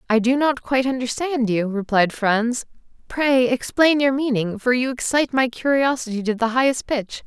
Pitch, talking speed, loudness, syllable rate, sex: 250 Hz, 175 wpm, -20 LUFS, 5.0 syllables/s, female